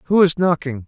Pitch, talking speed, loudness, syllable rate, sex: 160 Hz, 205 wpm, -17 LUFS, 6.0 syllables/s, male